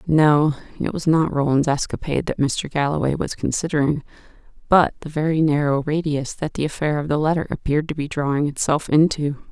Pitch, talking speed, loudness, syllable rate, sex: 150 Hz, 175 wpm, -21 LUFS, 5.6 syllables/s, female